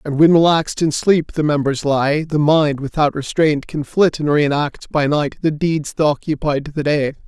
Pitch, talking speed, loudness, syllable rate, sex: 150 Hz, 205 wpm, -17 LUFS, 4.8 syllables/s, male